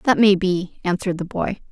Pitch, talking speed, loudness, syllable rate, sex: 190 Hz, 210 wpm, -20 LUFS, 5.1 syllables/s, female